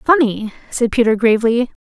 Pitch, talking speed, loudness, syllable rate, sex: 235 Hz, 130 wpm, -16 LUFS, 5.4 syllables/s, female